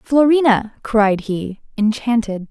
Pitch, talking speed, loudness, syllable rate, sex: 225 Hz, 95 wpm, -17 LUFS, 3.6 syllables/s, female